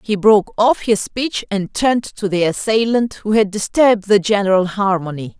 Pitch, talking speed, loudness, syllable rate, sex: 205 Hz, 180 wpm, -16 LUFS, 5.0 syllables/s, female